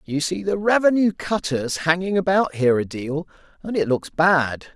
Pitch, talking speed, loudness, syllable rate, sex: 170 Hz, 175 wpm, -21 LUFS, 4.7 syllables/s, male